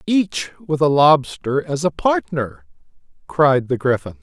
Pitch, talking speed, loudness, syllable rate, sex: 150 Hz, 140 wpm, -18 LUFS, 3.8 syllables/s, male